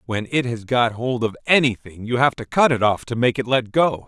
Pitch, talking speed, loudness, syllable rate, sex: 120 Hz, 265 wpm, -20 LUFS, 5.3 syllables/s, male